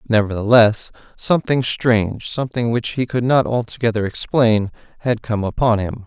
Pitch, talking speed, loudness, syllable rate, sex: 115 Hz, 140 wpm, -18 LUFS, 5.1 syllables/s, male